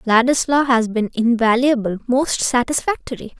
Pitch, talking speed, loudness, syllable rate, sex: 245 Hz, 105 wpm, -17 LUFS, 4.8 syllables/s, female